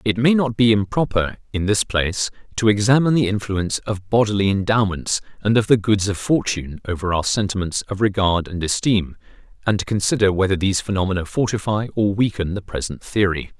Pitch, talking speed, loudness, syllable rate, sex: 100 Hz, 175 wpm, -20 LUFS, 5.8 syllables/s, male